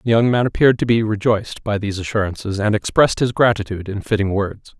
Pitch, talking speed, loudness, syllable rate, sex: 105 Hz, 215 wpm, -18 LUFS, 6.6 syllables/s, male